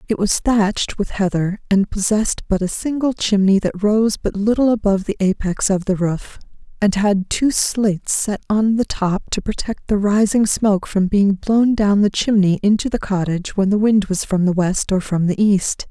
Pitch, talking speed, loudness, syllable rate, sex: 205 Hz, 205 wpm, -18 LUFS, 4.8 syllables/s, female